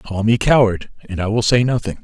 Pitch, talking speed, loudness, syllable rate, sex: 110 Hz, 235 wpm, -16 LUFS, 5.6 syllables/s, male